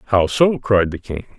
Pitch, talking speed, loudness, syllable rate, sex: 105 Hz, 215 wpm, -17 LUFS, 4.0 syllables/s, male